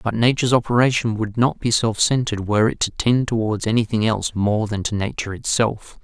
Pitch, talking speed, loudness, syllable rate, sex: 110 Hz, 200 wpm, -20 LUFS, 5.9 syllables/s, male